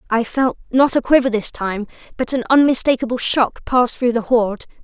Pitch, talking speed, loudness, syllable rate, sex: 245 Hz, 185 wpm, -17 LUFS, 5.3 syllables/s, female